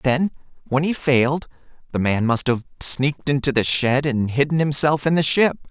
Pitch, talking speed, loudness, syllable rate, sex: 140 Hz, 190 wpm, -19 LUFS, 5.0 syllables/s, male